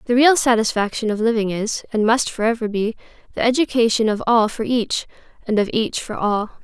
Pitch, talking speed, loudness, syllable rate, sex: 225 Hz, 190 wpm, -19 LUFS, 5.5 syllables/s, female